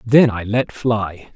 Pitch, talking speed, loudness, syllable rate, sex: 110 Hz, 175 wpm, -18 LUFS, 3.2 syllables/s, male